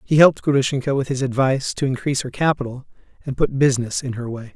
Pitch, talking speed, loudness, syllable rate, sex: 135 Hz, 210 wpm, -20 LUFS, 6.7 syllables/s, male